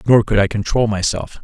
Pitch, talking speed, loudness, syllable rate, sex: 105 Hz, 210 wpm, -17 LUFS, 5.4 syllables/s, male